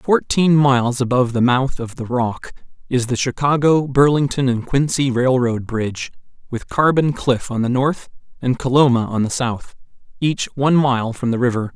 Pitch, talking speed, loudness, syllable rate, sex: 130 Hz, 170 wpm, -18 LUFS, 4.8 syllables/s, male